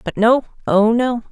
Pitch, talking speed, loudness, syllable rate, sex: 230 Hz, 135 wpm, -16 LUFS, 4.3 syllables/s, female